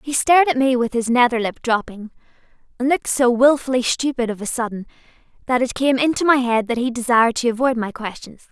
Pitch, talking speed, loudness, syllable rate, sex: 245 Hz, 210 wpm, -18 LUFS, 6.0 syllables/s, female